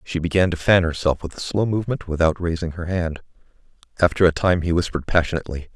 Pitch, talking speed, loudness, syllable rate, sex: 85 Hz, 200 wpm, -21 LUFS, 6.7 syllables/s, male